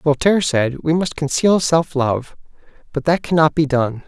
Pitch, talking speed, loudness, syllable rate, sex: 150 Hz, 190 wpm, -17 LUFS, 4.7 syllables/s, male